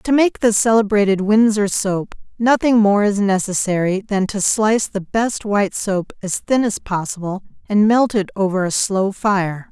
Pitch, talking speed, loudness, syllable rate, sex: 205 Hz, 175 wpm, -17 LUFS, 4.5 syllables/s, female